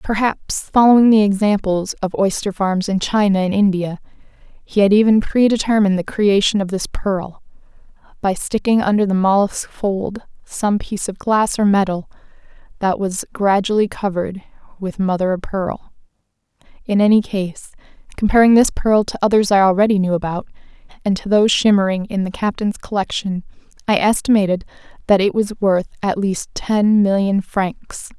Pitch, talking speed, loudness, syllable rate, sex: 200 Hz, 150 wpm, -17 LUFS, 5.1 syllables/s, female